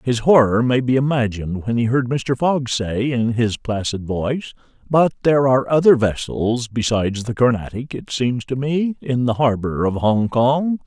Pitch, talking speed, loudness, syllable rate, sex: 125 Hz, 180 wpm, -19 LUFS, 4.7 syllables/s, male